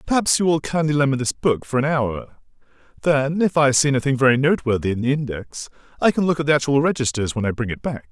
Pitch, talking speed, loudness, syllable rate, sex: 135 Hz, 235 wpm, -20 LUFS, 6.4 syllables/s, male